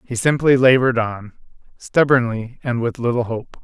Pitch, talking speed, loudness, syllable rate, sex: 120 Hz, 150 wpm, -18 LUFS, 5.0 syllables/s, male